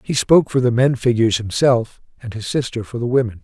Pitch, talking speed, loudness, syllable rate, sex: 120 Hz, 225 wpm, -17 LUFS, 6.1 syllables/s, male